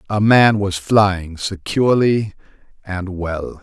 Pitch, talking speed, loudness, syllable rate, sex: 100 Hz, 115 wpm, -17 LUFS, 3.4 syllables/s, male